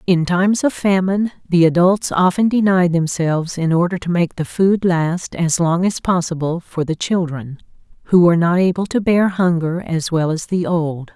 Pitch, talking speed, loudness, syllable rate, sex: 175 Hz, 190 wpm, -17 LUFS, 4.8 syllables/s, female